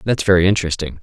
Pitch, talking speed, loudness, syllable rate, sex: 90 Hz, 175 wpm, -16 LUFS, 7.7 syllables/s, male